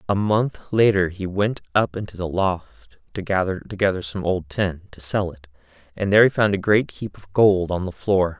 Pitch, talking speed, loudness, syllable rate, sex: 95 Hz, 215 wpm, -21 LUFS, 5.0 syllables/s, male